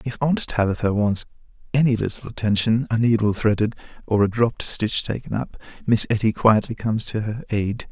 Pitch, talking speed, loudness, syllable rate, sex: 110 Hz, 175 wpm, -22 LUFS, 5.5 syllables/s, male